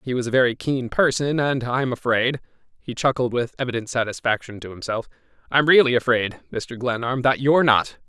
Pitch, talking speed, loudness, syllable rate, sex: 125 Hz, 165 wpm, -21 LUFS, 5.4 syllables/s, male